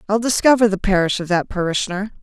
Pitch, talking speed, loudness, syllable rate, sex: 200 Hz, 190 wpm, -18 LUFS, 6.6 syllables/s, female